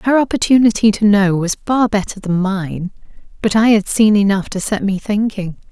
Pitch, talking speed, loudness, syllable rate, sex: 205 Hz, 190 wpm, -15 LUFS, 5.0 syllables/s, female